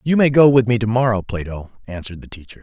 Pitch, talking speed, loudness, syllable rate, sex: 115 Hz, 250 wpm, -16 LUFS, 6.7 syllables/s, male